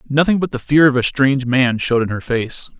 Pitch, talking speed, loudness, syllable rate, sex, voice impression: 135 Hz, 260 wpm, -16 LUFS, 5.9 syllables/s, male, masculine, adult-like, slightly thick, fluent, cool, slightly calm, slightly wild